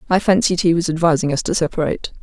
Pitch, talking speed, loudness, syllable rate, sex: 170 Hz, 215 wpm, -17 LUFS, 7.1 syllables/s, female